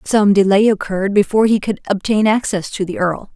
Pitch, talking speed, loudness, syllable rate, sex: 205 Hz, 195 wpm, -16 LUFS, 5.6 syllables/s, female